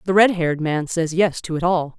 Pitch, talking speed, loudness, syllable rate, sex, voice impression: 170 Hz, 270 wpm, -20 LUFS, 5.5 syllables/s, female, slightly masculine, feminine, very gender-neutral, very adult-like, middle-aged, slightly thin, tensed, powerful, bright, hard, slightly muffled, fluent, slightly raspy, cool, intellectual, slightly refreshing, sincere, very calm, slightly mature, friendly, reassuring, slightly unique, slightly wild, slightly sweet, lively, kind